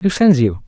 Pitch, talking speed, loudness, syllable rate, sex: 155 Hz, 265 wpm, -14 LUFS, 4.8 syllables/s, male